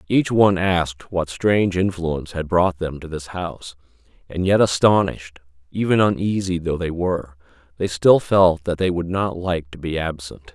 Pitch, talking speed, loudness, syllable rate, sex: 90 Hz, 175 wpm, -20 LUFS, 4.9 syllables/s, male